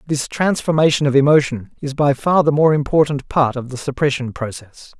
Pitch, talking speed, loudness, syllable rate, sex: 140 Hz, 180 wpm, -17 LUFS, 5.3 syllables/s, male